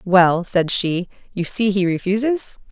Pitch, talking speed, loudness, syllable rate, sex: 195 Hz, 155 wpm, -19 LUFS, 4.0 syllables/s, female